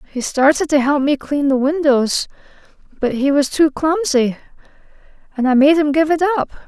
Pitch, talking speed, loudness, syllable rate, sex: 290 Hz, 180 wpm, -16 LUFS, 5.0 syllables/s, female